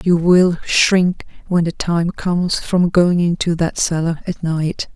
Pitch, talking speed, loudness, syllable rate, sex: 175 Hz, 170 wpm, -17 LUFS, 3.8 syllables/s, female